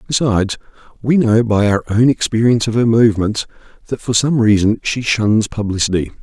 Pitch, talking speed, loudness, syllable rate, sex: 110 Hz, 165 wpm, -15 LUFS, 5.6 syllables/s, male